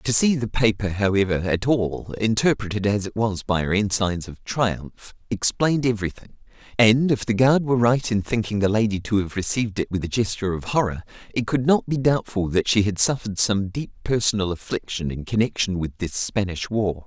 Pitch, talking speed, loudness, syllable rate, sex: 105 Hz, 195 wpm, -22 LUFS, 5.4 syllables/s, male